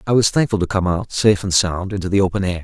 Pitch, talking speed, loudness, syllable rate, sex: 95 Hz, 295 wpm, -18 LUFS, 6.8 syllables/s, male